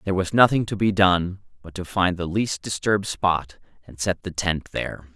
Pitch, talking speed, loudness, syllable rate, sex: 95 Hz, 210 wpm, -22 LUFS, 5.1 syllables/s, male